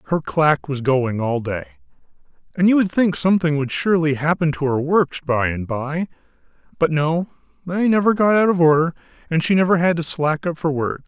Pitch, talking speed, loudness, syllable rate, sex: 160 Hz, 200 wpm, -19 LUFS, 5.3 syllables/s, male